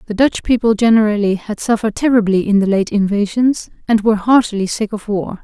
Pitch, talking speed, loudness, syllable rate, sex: 215 Hz, 190 wpm, -15 LUFS, 5.9 syllables/s, female